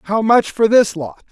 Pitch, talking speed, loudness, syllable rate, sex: 210 Hz, 230 wpm, -14 LUFS, 4.1 syllables/s, male